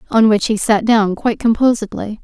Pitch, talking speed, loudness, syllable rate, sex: 220 Hz, 190 wpm, -15 LUFS, 5.5 syllables/s, female